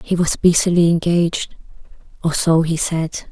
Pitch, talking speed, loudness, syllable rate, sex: 165 Hz, 145 wpm, -17 LUFS, 4.7 syllables/s, female